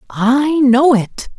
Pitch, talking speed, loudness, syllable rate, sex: 255 Hz, 130 wpm, -13 LUFS, 2.7 syllables/s, female